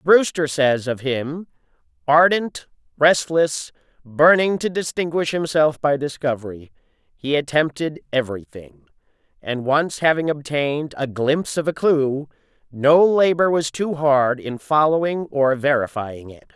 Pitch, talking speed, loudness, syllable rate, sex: 145 Hz, 120 wpm, -19 LUFS, 4.2 syllables/s, male